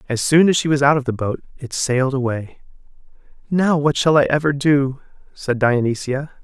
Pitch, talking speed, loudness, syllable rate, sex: 140 Hz, 185 wpm, -18 LUFS, 5.2 syllables/s, male